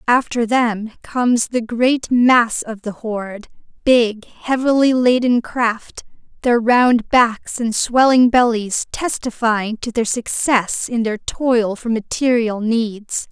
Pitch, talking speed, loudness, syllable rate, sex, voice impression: 235 Hz, 130 wpm, -17 LUFS, 3.5 syllables/s, female, very feminine, slightly young, slightly adult-like, very thin, slightly tensed, slightly weak, bright, slightly soft, clear, fluent, cute, intellectual, refreshing, sincere, slightly calm, slightly friendly, reassuring, very unique, elegant, wild, slightly sweet, very lively, very strict, slightly intense, sharp, light